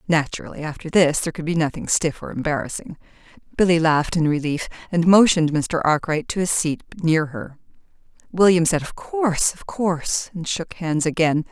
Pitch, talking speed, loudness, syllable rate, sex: 165 Hz, 170 wpm, -20 LUFS, 5.4 syllables/s, female